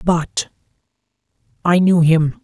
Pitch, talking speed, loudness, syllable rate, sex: 165 Hz, 75 wpm, -16 LUFS, 3.4 syllables/s, male